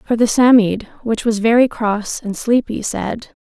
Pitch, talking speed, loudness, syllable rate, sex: 225 Hz, 175 wpm, -16 LUFS, 4.2 syllables/s, female